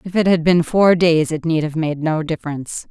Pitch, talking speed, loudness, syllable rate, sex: 165 Hz, 250 wpm, -17 LUFS, 5.4 syllables/s, female